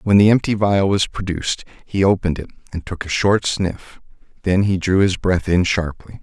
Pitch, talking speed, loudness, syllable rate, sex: 95 Hz, 200 wpm, -18 LUFS, 5.2 syllables/s, male